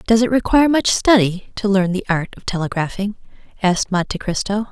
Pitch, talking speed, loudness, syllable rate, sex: 205 Hz, 180 wpm, -18 LUFS, 5.8 syllables/s, female